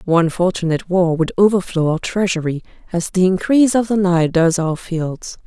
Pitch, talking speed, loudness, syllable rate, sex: 180 Hz, 175 wpm, -17 LUFS, 5.3 syllables/s, female